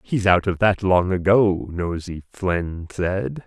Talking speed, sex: 155 wpm, male